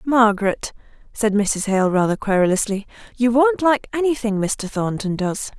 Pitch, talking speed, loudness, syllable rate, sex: 215 Hz, 140 wpm, -19 LUFS, 4.7 syllables/s, female